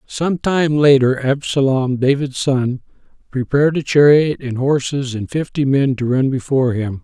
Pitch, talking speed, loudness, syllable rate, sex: 135 Hz, 155 wpm, -16 LUFS, 4.5 syllables/s, male